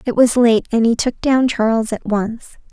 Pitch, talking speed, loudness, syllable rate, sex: 230 Hz, 220 wpm, -16 LUFS, 4.7 syllables/s, female